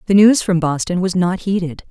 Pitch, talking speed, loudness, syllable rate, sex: 185 Hz, 220 wpm, -16 LUFS, 5.3 syllables/s, female